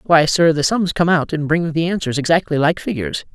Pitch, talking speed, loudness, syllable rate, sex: 155 Hz, 235 wpm, -17 LUFS, 5.7 syllables/s, male